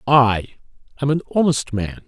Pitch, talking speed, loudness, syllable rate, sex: 125 Hz, 145 wpm, -19 LUFS, 4.9 syllables/s, male